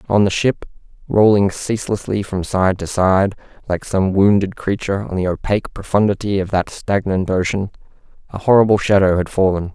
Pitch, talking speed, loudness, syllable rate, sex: 100 Hz, 150 wpm, -17 LUFS, 5.3 syllables/s, male